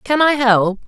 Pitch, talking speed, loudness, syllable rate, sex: 245 Hz, 205 wpm, -14 LUFS, 4.2 syllables/s, female